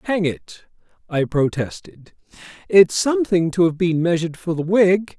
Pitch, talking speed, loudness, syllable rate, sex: 170 Hz, 150 wpm, -19 LUFS, 4.7 syllables/s, male